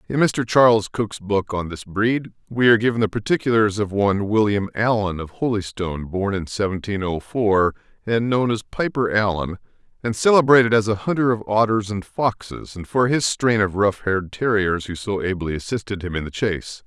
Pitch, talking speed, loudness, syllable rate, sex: 105 Hz, 190 wpm, -20 LUFS, 5.2 syllables/s, male